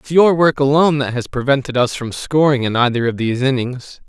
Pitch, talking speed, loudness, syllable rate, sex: 135 Hz, 220 wpm, -16 LUFS, 5.7 syllables/s, male